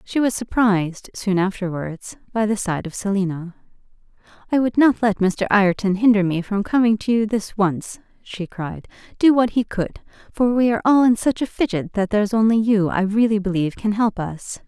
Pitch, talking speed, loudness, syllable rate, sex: 210 Hz, 195 wpm, -20 LUFS, 5.3 syllables/s, female